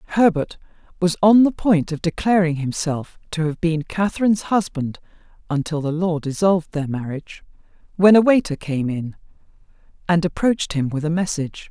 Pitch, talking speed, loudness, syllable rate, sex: 170 Hz, 150 wpm, -20 LUFS, 5.4 syllables/s, female